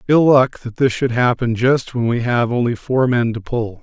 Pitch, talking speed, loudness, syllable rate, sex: 120 Hz, 235 wpm, -17 LUFS, 4.6 syllables/s, male